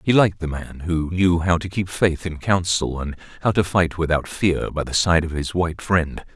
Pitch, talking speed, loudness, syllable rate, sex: 85 Hz, 235 wpm, -21 LUFS, 5.0 syllables/s, male